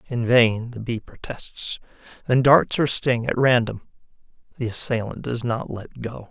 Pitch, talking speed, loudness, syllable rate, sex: 120 Hz, 160 wpm, -22 LUFS, 4.2 syllables/s, male